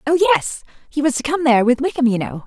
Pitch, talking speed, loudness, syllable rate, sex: 260 Hz, 245 wpm, -17 LUFS, 6.4 syllables/s, female